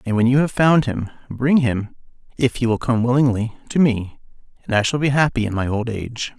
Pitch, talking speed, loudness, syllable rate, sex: 120 Hz, 225 wpm, -19 LUFS, 5.5 syllables/s, male